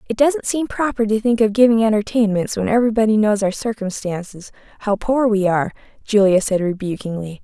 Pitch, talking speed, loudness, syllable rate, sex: 215 Hz, 160 wpm, -18 LUFS, 5.8 syllables/s, female